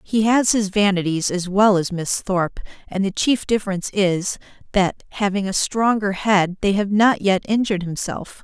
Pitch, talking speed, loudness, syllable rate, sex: 200 Hz, 180 wpm, -20 LUFS, 4.8 syllables/s, female